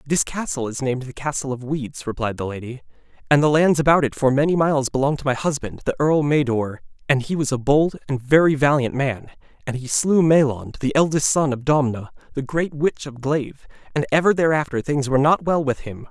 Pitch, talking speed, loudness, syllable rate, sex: 140 Hz, 215 wpm, -20 LUFS, 5.7 syllables/s, male